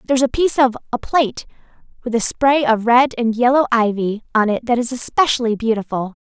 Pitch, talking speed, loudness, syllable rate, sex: 240 Hz, 195 wpm, -17 LUFS, 5.8 syllables/s, female